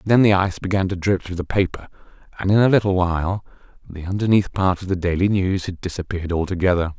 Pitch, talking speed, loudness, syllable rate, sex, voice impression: 95 Hz, 205 wpm, -20 LUFS, 6.4 syllables/s, male, masculine, adult-like, slightly thick, cool, calm, reassuring, slightly elegant